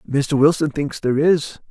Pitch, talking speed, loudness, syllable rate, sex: 145 Hz, 175 wpm, -18 LUFS, 4.9 syllables/s, male